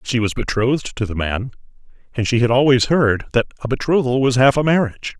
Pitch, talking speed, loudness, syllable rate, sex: 125 Hz, 210 wpm, -18 LUFS, 5.9 syllables/s, male